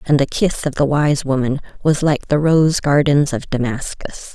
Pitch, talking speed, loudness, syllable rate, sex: 145 Hz, 195 wpm, -17 LUFS, 4.5 syllables/s, female